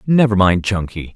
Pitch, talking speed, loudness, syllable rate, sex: 100 Hz, 155 wpm, -15 LUFS, 4.9 syllables/s, male